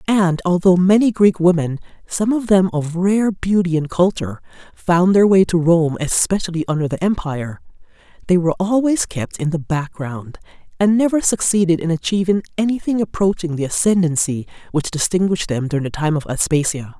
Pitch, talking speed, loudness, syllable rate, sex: 175 Hz, 160 wpm, -17 LUFS, 5.4 syllables/s, female